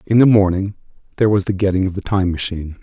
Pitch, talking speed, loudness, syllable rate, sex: 95 Hz, 235 wpm, -17 LUFS, 7.0 syllables/s, male